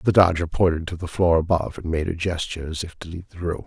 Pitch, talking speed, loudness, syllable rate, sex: 85 Hz, 280 wpm, -23 LUFS, 6.8 syllables/s, male